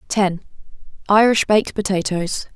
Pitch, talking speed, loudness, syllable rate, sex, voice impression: 200 Hz, 70 wpm, -18 LUFS, 5.0 syllables/s, female, feminine, adult-like, slightly soft, fluent, slightly intellectual, calm, slightly friendly, slightly sweet